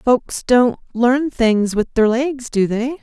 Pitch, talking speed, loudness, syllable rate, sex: 240 Hz, 180 wpm, -17 LUFS, 3.3 syllables/s, female